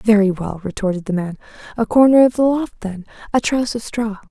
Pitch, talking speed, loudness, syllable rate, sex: 220 Hz, 210 wpm, -17 LUFS, 5.6 syllables/s, female